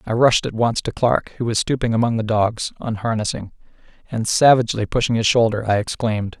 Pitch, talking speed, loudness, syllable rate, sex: 115 Hz, 190 wpm, -19 LUFS, 5.8 syllables/s, male